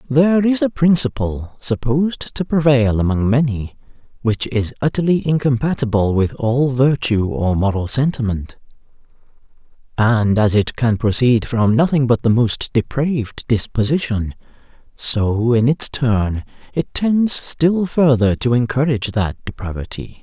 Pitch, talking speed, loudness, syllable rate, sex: 125 Hz, 130 wpm, -17 LUFS, 4.4 syllables/s, male